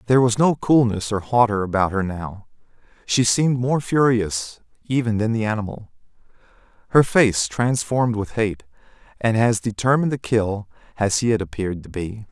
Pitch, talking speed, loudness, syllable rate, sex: 110 Hz, 160 wpm, -20 LUFS, 5.2 syllables/s, male